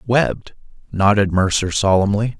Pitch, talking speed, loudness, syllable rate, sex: 105 Hz, 100 wpm, -17 LUFS, 4.7 syllables/s, male